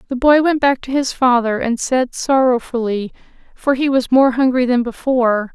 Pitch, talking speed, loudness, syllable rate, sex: 255 Hz, 185 wpm, -16 LUFS, 4.9 syllables/s, female